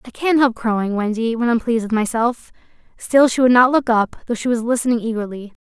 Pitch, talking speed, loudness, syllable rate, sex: 235 Hz, 225 wpm, -18 LUFS, 5.9 syllables/s, female